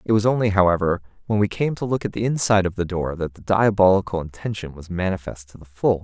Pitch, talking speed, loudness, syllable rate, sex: 95 Hz, 240 wpm, -21 LUFS, 6.4 syllables/s, male